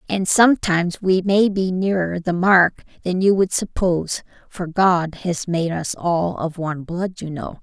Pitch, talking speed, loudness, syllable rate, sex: 180 Hz, 180 wpm, -19 LUFS, 4.3 syllables/s, female